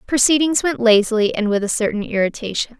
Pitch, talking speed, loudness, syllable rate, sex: 235 Hz, 195 wpm, -17 LUFS, 6.5 syllables/s, female